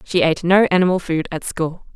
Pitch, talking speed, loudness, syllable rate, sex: 175 Hz, 215 wpm, -18 LUFS, 5.7 syllables/s, female